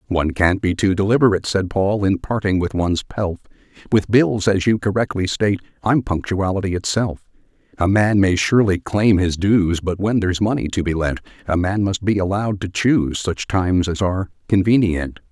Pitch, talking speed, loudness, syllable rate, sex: 95 Hz, 185 wpm, -19 LUFS, 5.4 syllables/s, male